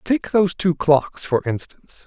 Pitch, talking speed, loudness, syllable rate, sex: 170 Hz, 175 wpm, -20 LUFS, 4.6 syllables/s, male